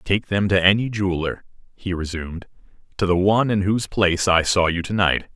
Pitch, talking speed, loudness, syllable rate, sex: 95 Hz, 190 wpm, -20 LUFS, 5.9 syllables/s, male